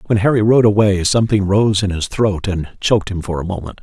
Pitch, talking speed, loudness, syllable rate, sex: 100 Hz, 235 wpm, -16 LUFS, 5.8 syllables/s, male